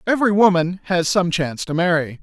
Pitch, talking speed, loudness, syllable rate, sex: 180 Hz, 190 wpm, -18 LUFS, 6.0 syllables/s, male